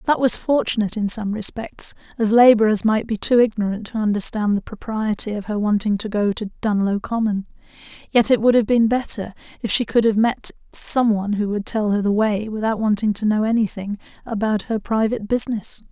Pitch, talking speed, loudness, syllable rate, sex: 215 Hz, 195 wpm, -20 LUFS, 5.6 syllables/s, female